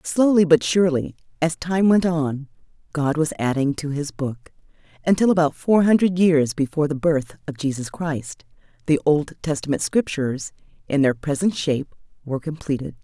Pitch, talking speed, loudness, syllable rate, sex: 155 Hz, 155 wpm, -21 LUFS, 5.1 syllables/s, female